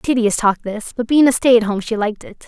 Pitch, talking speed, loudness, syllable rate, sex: 230 Hz, 290 wpm, -16 LUFS, 5.8 syllables/s, female